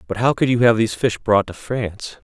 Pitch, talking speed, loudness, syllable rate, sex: 110 Hz, 260 wpm, -19 LUFS, 5.9 syllables/s, male